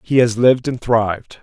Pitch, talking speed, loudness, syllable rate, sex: 120 Hz, 210 wpm, -16 LUFS, 5.3 syllables/s, male